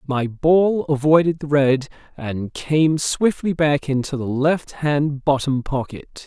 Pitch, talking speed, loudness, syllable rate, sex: 145 Hz, 145 wpm, -19 LUFS, 3.6 syllables/s, male